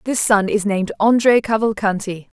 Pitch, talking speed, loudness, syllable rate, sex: 210 Hz, 150 wpm, -17 LUFS, 5.1 syllables/s, female